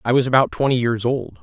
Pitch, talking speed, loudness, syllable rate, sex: 120 Hz, 255 wpm, -19 LUFS, 6.1 syllables/s, male